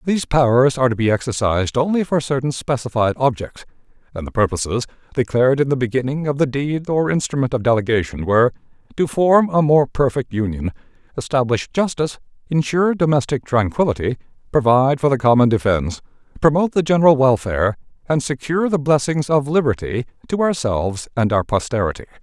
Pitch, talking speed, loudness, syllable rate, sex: 130 Hz, 155 wpm, -18 LUFS, 6.1 syllables/s, male